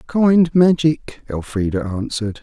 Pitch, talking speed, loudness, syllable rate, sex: 135 Hz, 100 wpm, -17 LUFS, 4.0 syllables/s, male